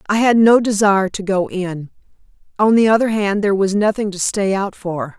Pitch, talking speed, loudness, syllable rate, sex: 200 Hz, 210 wpm, -16 LUFS, 5.4 syllables/s, female